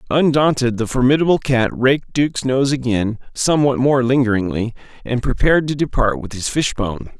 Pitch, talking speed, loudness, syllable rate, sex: 130 Hz, 150 wpm, -17 LUFS, 5.6 syllables/s, male